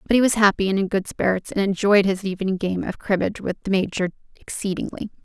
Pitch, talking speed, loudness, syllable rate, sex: 195 Hz, 220 wpm, -22 LUFS, 6.5 syllables/s, female